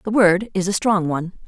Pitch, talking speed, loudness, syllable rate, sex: 190 Hz, 245 wpm, -19 LUFS, 5.7 syllables/s, female